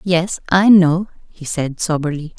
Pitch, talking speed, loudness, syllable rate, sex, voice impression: 170 Hz, 150 wpm, -16 LUFS, 4.0 syllables/s, female, feminine, slightly adult-like, cute, refreshing, friendly, slightly sweet